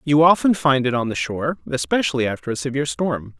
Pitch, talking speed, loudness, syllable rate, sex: 135 Hz, 210 wpm, -20 LUFS, 6.3 syllables/s, male